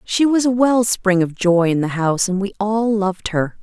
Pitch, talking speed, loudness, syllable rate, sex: 200 Hz, 250 wpm, -17 LUFS, 4.9 syllables/s, female